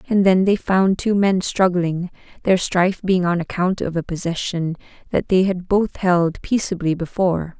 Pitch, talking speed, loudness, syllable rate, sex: 180 Hz, 175 wpm, -19 LUFS, 4.6 syllables/s, female